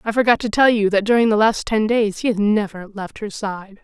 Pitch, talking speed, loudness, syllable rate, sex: 210 Hz, 265 wpm, -18 LUFS, 5.5 syllables/s, female